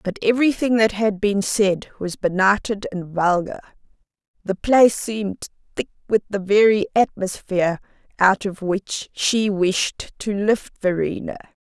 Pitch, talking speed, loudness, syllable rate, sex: 205 Hz, 135 wpm, -20 LUFS, 4.3 syllables/s, female